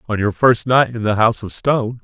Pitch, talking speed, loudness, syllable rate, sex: 115 Hz, 265 wpm, -16 LUFS, 6.0 syllables/s, male